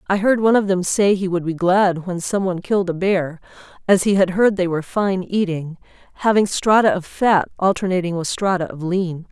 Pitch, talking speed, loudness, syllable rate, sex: 185 Hz, 210 wpm, -18 LUFS, 5.4 syllables/s, female